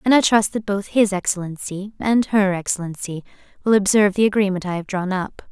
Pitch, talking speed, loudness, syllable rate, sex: 195 Hz, 195 wpm, -20 LUFS, 5.7 syllables/s, female